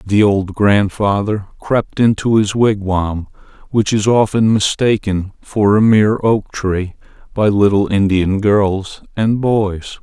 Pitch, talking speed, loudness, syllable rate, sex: 105 Hz, 130 wpm, -15 LUFS, 3.7 syllables/s, male